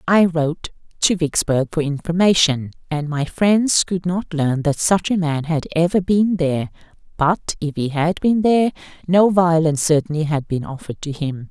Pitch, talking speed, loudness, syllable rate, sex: 165 Hz, 175 wpm, -18 LUFS, 4.8 syllables/s, female